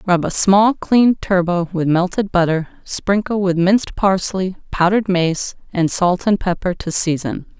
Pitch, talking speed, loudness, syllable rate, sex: 185 Hz, 160 wpm, -17 LUFS, 4.4 syllables/s, female